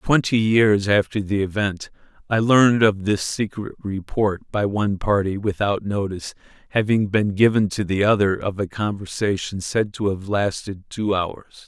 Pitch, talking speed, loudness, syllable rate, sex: 100 Hz, 160 wpm, -21 LUFS, 4.6 syllables/s, male